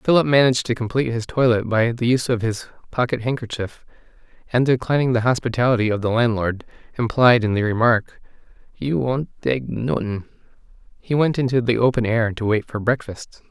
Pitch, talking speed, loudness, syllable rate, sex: 120 Hz, 170 wpm, -20 LUFS, 5.6 syllables/s, male